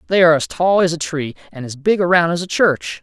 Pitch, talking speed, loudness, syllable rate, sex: 155 Hz, 280 wpm, -16 LUFS, 6.0 syllables/s, male